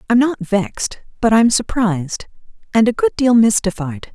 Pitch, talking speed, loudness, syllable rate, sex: 220 Hz, 145 wpm, -16 LUFS, 5.0 syllables/s, female